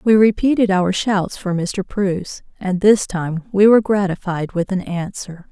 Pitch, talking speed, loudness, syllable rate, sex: 190 Hz, 175 wpm, -18 LUFS, 4.3 syllables/s, female